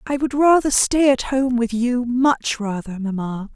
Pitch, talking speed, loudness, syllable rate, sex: 245 Hz, 170 wpm, -19 LUFS, 4.2 syllables/s, female